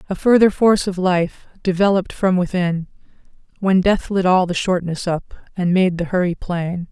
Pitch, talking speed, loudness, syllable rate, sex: 185 Hz, 175 wpm, -18 LUFS, 4.9 syllables/s, female